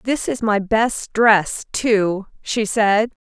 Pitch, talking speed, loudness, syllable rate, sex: 215 Hz, 145 wpm, -18 LUFS, 2.8 syllables/s, female